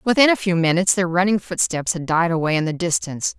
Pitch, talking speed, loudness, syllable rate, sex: 175 Hz, 230 wpm, -19 LUFS, 6.4 syllables/s, female